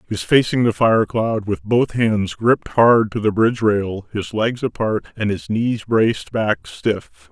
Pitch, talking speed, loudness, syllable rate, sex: 110 Hz, 195 wpm, -18 LUFS, 4.2 syllables/s, male